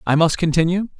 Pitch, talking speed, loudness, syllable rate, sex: 170 Hz, 180 wpm, -18 LUFS, 6.1 syllables/s, male